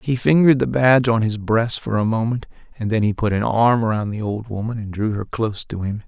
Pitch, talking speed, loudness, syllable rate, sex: 110 Hz, 255 wpm, -19 LUFS, 5.8 syllables/s, male